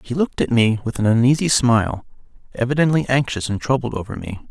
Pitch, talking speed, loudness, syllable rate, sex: 125 Hz, 185 wpm, -19 LUFS, 6.2 syllables/s, male